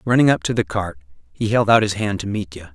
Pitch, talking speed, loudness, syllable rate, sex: 100 Hz, 260 wpm, -19 LUFS, 6.1 syllables/s, male